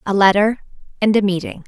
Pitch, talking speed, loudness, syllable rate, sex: 200 Hz, 180 wpm, -17 LUFS, 6.3 syllables/s, female